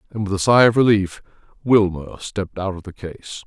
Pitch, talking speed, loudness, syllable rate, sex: 100 Hz, 210 wpm, -18 LUFS, 5.5 syllables/s, male